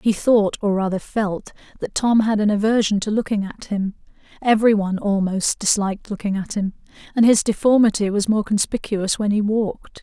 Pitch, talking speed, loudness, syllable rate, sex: 210 Hz, 180 wpm, -20 LUFS, 5.3 syllables/s, female